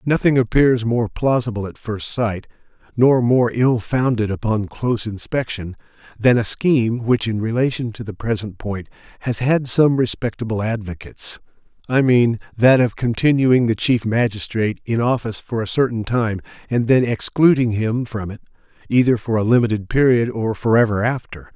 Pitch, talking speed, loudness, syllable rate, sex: 115 Hz, 155 wpm, -19 LUFS, 5.0 syllables/s, male